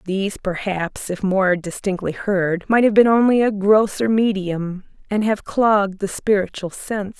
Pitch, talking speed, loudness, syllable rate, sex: 200 Hz, 160 wpm, -19 LUFS, 4.5 syllables/s, female